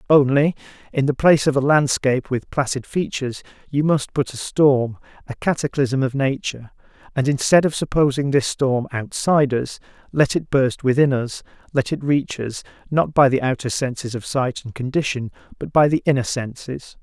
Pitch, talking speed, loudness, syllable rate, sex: 135 Hz, 175 wpm, -20 LUFS, 5.1 syllables/s, male